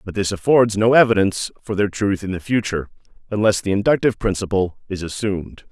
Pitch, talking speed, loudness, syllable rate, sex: 100 Hz, 180 wpm, -19 LUFS, 6.2 syllables/s, male